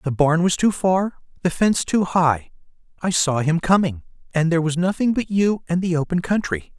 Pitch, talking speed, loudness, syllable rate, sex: 170 Hz, 205 wpm, -20 LUFS, 5.2 syllables/s, male